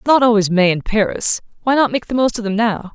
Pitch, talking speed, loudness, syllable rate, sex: 220 Hz, 265 wpm, -16 LUFS, 8.7 syllables/s, female